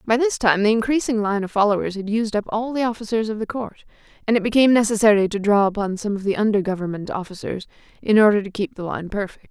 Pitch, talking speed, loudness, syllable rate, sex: 210 Hz, 235 wpm, -20 LUFS, 6.5 syllables/s, female